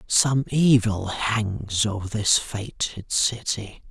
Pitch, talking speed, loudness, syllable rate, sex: 110 Hz, 110 wpm, -23 LUFS, 3.0 syllables/s, male